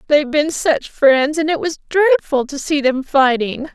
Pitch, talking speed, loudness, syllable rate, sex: 290 Hz, 190 wpm, -16 LUFS, 5.0 syllables/s, female